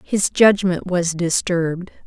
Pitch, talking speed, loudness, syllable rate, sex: 180 Hz, 115 wpm, -18 LUFS, 3.8 syllables/s, female